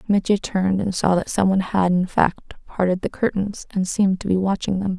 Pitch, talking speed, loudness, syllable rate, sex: 190 Hz, 230 wpm, -21 LUFS, 5.6 syllables/s, female